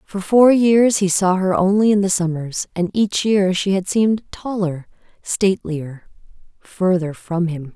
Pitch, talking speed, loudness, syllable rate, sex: 190 Hz, 165 wpm, -18 LUFS, 4.2 syllables/s, female